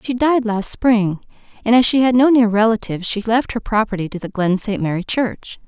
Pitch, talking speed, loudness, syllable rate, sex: 220 Hz, 220 wpm, -17 LUFS, 5.3 syllables/s, female